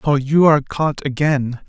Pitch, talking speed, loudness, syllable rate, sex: 140 Hz, 180 wpm, -17 LUFS, 4.5 syllables/s, male